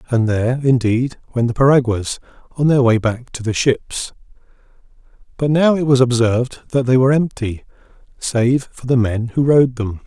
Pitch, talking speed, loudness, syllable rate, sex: 125 Hz, 175 wpm, -17 LUFS, 5.0 syllables/s, male